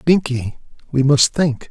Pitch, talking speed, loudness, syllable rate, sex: 135 Hz, 140 wpm, -17 LUFS, 4.0 syllables/s, male